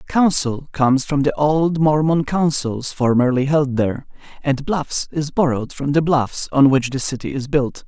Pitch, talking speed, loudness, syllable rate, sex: 140 Hz, 175 wpm, -18 LUFS, 4.6 syllables/s, male